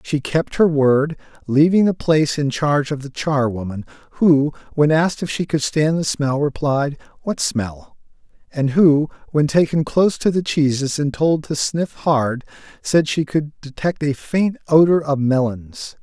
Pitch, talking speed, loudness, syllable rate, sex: 145 Hz, 170 wpm, -18 LUFS, 4.4 syllables/s, male